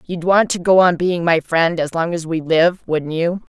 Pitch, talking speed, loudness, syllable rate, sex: 170 Hz, 255 wpm, -17 LUFS, 4.5 syllables/s, female